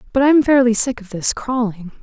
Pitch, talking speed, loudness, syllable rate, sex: 235 Hz, 235 wpm, -16 LUFS, 5.9 syllables/s, female